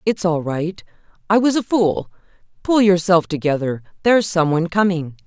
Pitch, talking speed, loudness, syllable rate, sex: 180 Hz, 125 wpm, -18 LUFS, 5.2 syllables/s, female